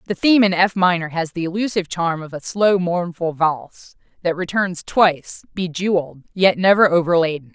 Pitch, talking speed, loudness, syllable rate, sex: 175 Hz, 165 wpm, -18 LUFS, 5.4 syllables/s, female